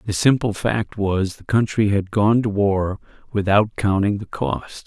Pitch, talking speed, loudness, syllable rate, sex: 105 Hz, 175 wpm, -20 LUFS, 4.1 syllables/s, male